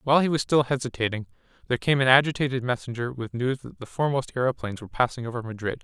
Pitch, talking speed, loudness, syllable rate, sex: 125 Hz, 205 wpm, -25 LUFS, 7.4 syllables/s, male